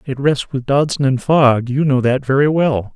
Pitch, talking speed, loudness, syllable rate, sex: 135 Hz, 225 wpm, -15 LUFS, 4.6 syllables/s, male